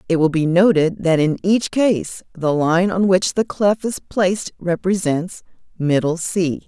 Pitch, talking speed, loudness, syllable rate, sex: 180 Hz, 170 wpm, -18 LUFS, 4.1 syllables/s, female